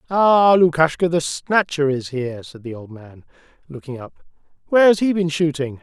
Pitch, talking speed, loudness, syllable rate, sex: 155 Hz, 175 wpm, -17 LUFS, 5.2 syllables/s, male